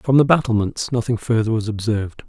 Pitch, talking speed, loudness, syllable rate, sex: 115 Hz, 185 wpm, -19 LUFS, 5.9 syllables/s, male